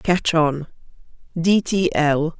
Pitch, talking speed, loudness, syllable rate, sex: 170 Hz, 100 wpm, -19 LUFS, 3.0 syllables/s, female